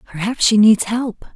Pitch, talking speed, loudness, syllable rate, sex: 220 Hz, 180 wpm, -15 LUFS, 4.1 syllables/s, female